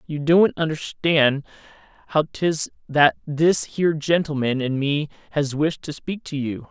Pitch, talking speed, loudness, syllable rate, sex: 150 Hz, 150 wpm, -21 LUFS, 4.1 syllables/s, male